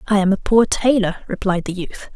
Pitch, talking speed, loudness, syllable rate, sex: 200 Hz, 225 wpm, -18 LUFS, 5.2 syllables/s, female